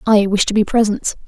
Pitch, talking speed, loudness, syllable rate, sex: 210 Hz, 235 wpm, -16 LUFS, 5.6 syllables/s, female